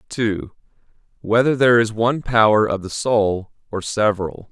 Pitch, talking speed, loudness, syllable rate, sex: 110 Hz, 145 wpm, -18 LUFS, 5.6 syllables/s, male